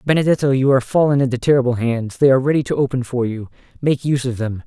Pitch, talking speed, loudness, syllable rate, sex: 130 Hz, 220 wpm, -17 LUFS, 7.1 syllables/s, male